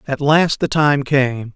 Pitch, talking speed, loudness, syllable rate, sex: 140 Hz, 190 wpm, -16 LUFS, 3.6 syllables/s, male